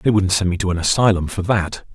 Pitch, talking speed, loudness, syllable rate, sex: 95 Hz, 280 wpm, -18 LUFS, 5.9 syllables/s, male